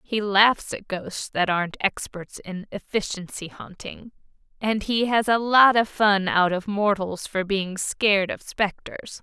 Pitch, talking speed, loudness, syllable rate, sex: 200 Hz, 165 wpm, -22 LUFS, 4.0 syllables/s, female